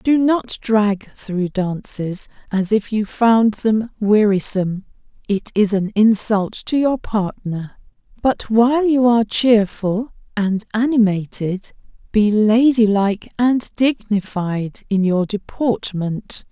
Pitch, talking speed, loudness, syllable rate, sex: 215 Hz, 120 wpm, -18 LUFS, 3.5 syllables/s, female